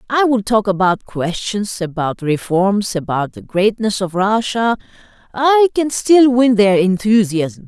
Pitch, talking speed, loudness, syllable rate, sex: 210 Hz, 140 wpm, -16 LUFS, 3.9 syllables/s, female